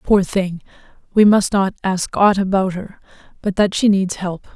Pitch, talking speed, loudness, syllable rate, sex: 190 Hz, 185 wpm, -17 LUFS, 4.4 syllables/s, female